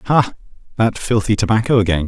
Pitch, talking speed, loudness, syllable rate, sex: 110 Hz, 145 wpm, -17 LUFS, 5.8 syllables/s, male